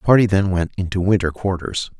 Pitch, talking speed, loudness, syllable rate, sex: 95 Hz, 210 wpm, -19 LUFS, 6.0 syllables/s, male